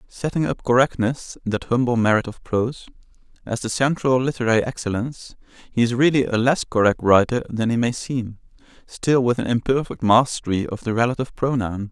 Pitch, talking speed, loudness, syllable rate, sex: 120 Hz, 165 wpm, -21 LUFS, 5.6 syllables/s, male